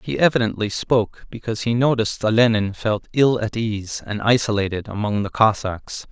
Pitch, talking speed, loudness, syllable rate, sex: 110 Hz, 155 wpm, -20 LUFS, 5.3 syllables/s, male